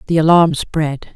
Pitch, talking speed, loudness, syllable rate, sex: 160 Hz, 155 wpm, -15 LUFS, 4.1 syllables/s, female